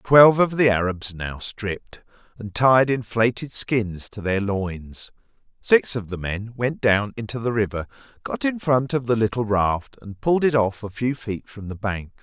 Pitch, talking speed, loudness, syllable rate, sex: 110 Hz, 190 wpm, -22 LUFS, 4.5 syllables/s, male